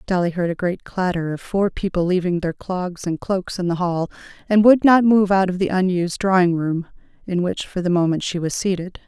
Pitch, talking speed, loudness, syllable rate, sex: 180 Hz, 225 wpm, -20 LUFS, 5.3 syllables/s, female